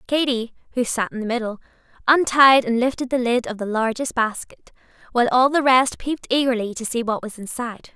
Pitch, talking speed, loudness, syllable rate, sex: 245 Hz, 195 wpm, -20 LUFS, 5.8 syllables/s, female